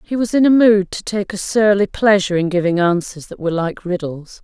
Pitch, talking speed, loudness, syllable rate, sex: 195 Hz, 230 wpm, -16 LUFS, 5.5 syllables/s, female